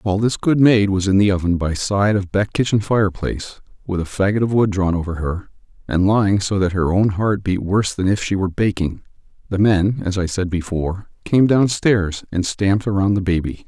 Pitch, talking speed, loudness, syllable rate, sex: 100 Hz, 215 wpm, -18 LUFS, 5.3 syllables/s, male